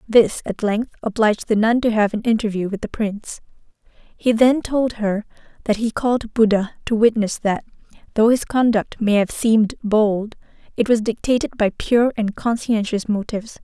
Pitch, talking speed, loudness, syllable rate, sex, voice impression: 220 Hz, 170 wpm, -19 LUFS, 4.9 syllables/s, female, feminine, slightly adult-like, slightly muffled, slightly cute, slightly refreshing, slightly sincere